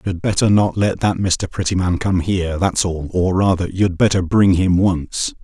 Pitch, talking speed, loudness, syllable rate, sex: 90 Hz, 200 wpm, -17 LUFS, 4.6 syllables/s, male